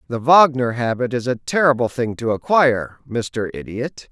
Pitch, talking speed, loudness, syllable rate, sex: 125 Hz, 160 wpm, -18 LUFS, 4.7 syllables/s, male